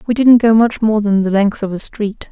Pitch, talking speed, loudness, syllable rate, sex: 215 Hz, 285 wpm, -14 LUFS, 5.1 syllables/s, female